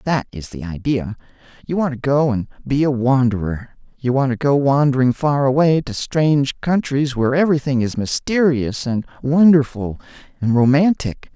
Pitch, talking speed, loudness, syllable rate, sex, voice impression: 135 Hz, 160 wpm, -18 LUFS, 5.0 syllables/s, male, masculine, adult-like, slightly raspy, slightly cool, slightly refreshing, sincere, friendly